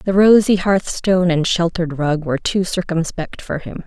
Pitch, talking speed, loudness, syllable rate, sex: 175 Hz, 170 wpm, -17 LUFS, 5.1 syllables/s, female